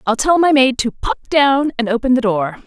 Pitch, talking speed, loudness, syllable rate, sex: 250 Hz, 245 wpm, -15 LUFS, 5.2 syllables/s, female